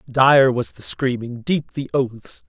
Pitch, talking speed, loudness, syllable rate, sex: 130 Hz, 145 wpm, -19 LUFS, 3.5 syllables/s, male